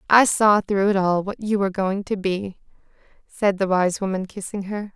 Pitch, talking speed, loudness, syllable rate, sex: 195 Hz, 205 wpm, -21 LUFS, 4.9 syllables/s, female